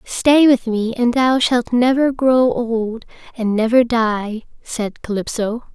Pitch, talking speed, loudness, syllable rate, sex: 235 Hz, 145 wpm, -17 LUFS, 3.6 syllables/s, female